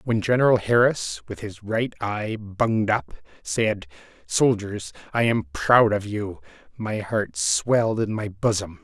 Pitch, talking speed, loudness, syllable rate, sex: 110 Hz, 150 wpm, -23 LUFS, 3.4 syllables/s, male